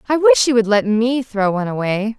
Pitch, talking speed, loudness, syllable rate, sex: 220 Hz, 245 wpm, -16 LUFS, 5.5 syllables/s, female